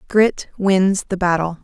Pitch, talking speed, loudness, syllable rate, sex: 185 Hz, 145 wpm, -18 LUFS, 3.8 syllables/s, female